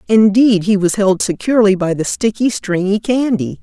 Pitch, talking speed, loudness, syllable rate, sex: 205 Hz, 165 wpm, -14 LUFS, 4.9 syllables/s, female